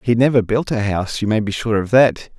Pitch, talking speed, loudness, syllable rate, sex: 110 Hz, 275 wpm, -17 LUFS, 5.8 syllables/s, male